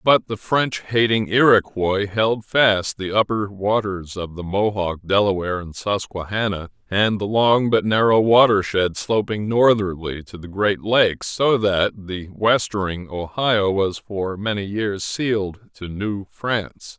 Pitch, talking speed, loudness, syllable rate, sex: 100 Hz, 145 wpm, -20 LUFS, 4.1 syllables/s, male